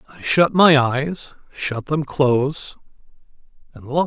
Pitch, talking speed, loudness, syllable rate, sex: 145 Hz, 105 wpm, -18 LUFS, 3.9 syllables/s, male